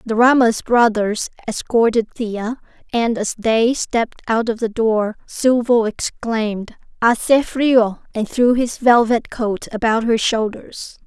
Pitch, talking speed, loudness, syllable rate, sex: 230 Hz, 135 wpm, -18 LUFS, 3.7 syllables/s, female